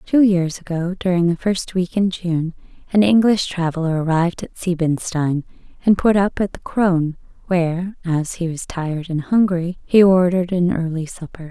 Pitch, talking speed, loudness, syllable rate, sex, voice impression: 175 Hz, 170 wpm, -19 LUFS, 5.0 syllables/s, female, feminine, slightly adult-like, slightly weak, soft, slightly cute, slightly calm, kind, modest